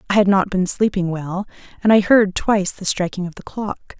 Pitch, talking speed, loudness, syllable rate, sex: 195 Hz, 225 wpm, -19 LUFS, 5.6 syllables/s, female